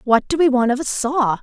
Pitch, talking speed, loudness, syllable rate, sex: 260 Hz, 295 wpm, -18 LUFS, 5.3 syllables/s, female